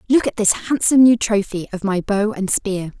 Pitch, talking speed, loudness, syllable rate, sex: 210 Hz, 220 wpm, -17 LUFS, 5.2 syllables/s, female